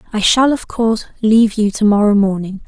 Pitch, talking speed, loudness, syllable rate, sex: 215 Hz, 200 wpm, -14 LUFS, 5.9 syllables/s, female